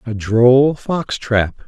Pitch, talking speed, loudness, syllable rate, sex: 120 Hz, 145 wpm, -15 LUFS, 2.7 syllables/s, male